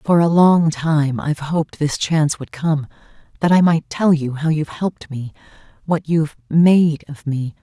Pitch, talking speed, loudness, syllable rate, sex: 155 Hz, 190 wpm, -18 LUFS, 4.8 syllables/s, female